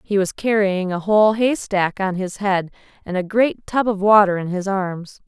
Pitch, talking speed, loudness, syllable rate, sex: 195 Hz, 205 wpm, -19 LUFS, 4.6 syllables/s, female